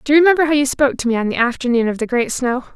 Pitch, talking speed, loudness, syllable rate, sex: 260 Hz, 325 wpm, -16 LUFS, 7.7 syllables/s, female